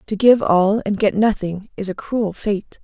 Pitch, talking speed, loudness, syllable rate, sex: 205 Hz, 210 wpm, -18 LUFS, 4.2 syllables/s, female